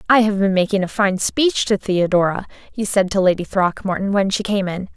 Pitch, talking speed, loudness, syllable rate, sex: 195 Hz, 220 wpm, -18 LUFS, 5.4 syllables/s, female